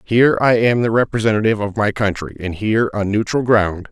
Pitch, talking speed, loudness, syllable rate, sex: 110 Hz, 200 wpm, -17 LUFS, 6.0 syllables/s, male